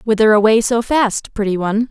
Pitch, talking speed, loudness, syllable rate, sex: 220 Hz, 190 wpm, -15 LUFS, 5.5 syllables/s, female